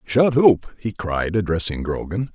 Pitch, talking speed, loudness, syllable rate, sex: 100 Hz, 155 wpm, -20 LUFS, 4.2 syllables/s, male